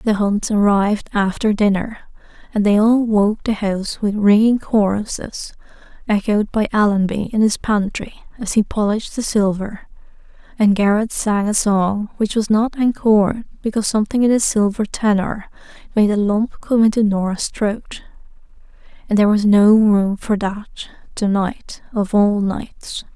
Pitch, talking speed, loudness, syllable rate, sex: 210 Hz, 150 wpm, -17 LUFS, 4.6 syllables/s, female